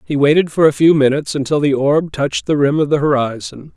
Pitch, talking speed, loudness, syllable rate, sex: 145 Hz, 240 wpm, -15 LUFS, 6.1 syllables/s, male